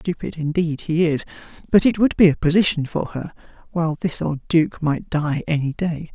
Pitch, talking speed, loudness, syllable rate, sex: 160 Hz, 195 wpm, -20 LUFS, 5.1 syllables/s, male